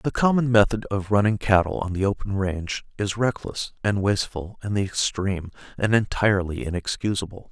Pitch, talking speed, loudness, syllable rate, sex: 100 Hz, 160 wpm, -24 LUFS, 5.5 syllables/s, male